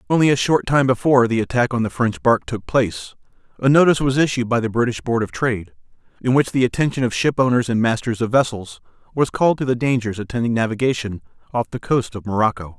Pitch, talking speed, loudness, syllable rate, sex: 120 Hz, 215 wpm, -19 LUFS, 6.5 syllables/s, male